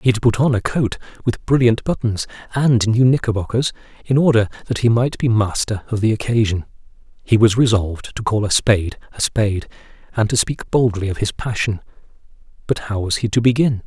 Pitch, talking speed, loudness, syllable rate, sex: 115 Hz, 190 wpm, -18 LUFS, 5.6 syllables/s, male